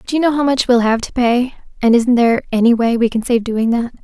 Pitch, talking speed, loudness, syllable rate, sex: 240 Hz, 285 wpm, -15 LUFS, 6.1 syllables/s, female